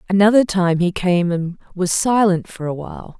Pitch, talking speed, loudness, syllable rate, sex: 185 Hz, 190 wpm, -18 LUFS, 5.0 syllables/s, female